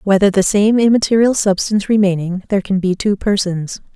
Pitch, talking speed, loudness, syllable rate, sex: 200 Hz, 165 wpm, -15 LUFS, 5.7 syllables/s, female